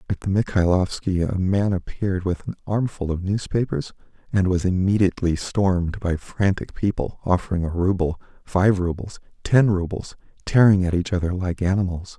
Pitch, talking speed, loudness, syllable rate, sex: 95 Hz, 155 wpm, -22 LUFS, 5.1 syllables/s, male